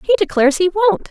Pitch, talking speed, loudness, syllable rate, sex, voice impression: 365 Hz, 215 wpm, -15 LUFS, 6.1 syllables/s, female, feminine, slightly adult-like, slightly powerful, unique, slightly lively, slightly intense